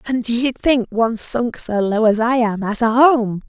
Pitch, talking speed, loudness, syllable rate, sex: 230 Hz, 240 wpm, -17 LUFS, 4.5 syllables/s, female